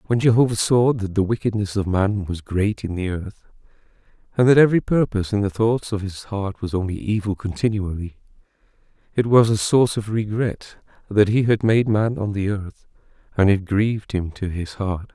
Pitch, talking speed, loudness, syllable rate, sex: 105 Hz, 190 wpm, -21 LUFS, 5.2 syllables/s, male